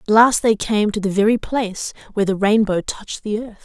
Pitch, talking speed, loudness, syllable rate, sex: 210 Hz, 230 wpm, -19 LUFS, 5.9 syllables/s, female